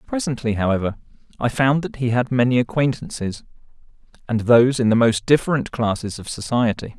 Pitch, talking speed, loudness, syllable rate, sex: 125 Hz, 155 wpm, -20 LUFS, 5.7 syllables/s, male